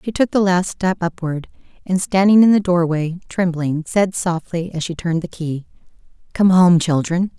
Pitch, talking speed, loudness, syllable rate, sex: 175 Hz, 180 wpm, -18 LUFS, 4.8 syllables/s, female